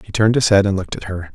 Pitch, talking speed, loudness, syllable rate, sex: 100 Hz, 355 wpm, -17 LUFS, 8.0 syllables/s, male